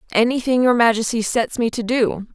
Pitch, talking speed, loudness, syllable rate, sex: 230 Hz, 180 wpm, -18 LUFS, 5.3 syllables/s, female